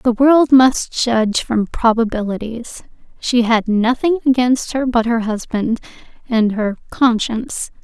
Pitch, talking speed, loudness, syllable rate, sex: 235 Hz, 130 wpm, -16 LUFS, 4.0 syllables/s, female